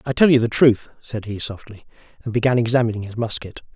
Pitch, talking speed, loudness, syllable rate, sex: 115 Hz, 210 wpm, -20 LUFS, 6.2 syllables/s, male